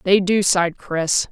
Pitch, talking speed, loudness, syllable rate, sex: 185 Hz, 185 wpm, -18 LUFS, 4.2 syllables/s, female